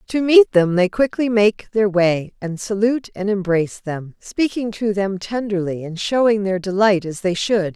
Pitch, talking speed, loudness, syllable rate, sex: 200 Hz, 185 wpm, -19 LUFS, 4.6 syllables/s, female